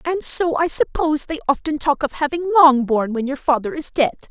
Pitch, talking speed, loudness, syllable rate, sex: 290 Hz, 210 wpm, -19 LUFS, 5.2 syllables/s, female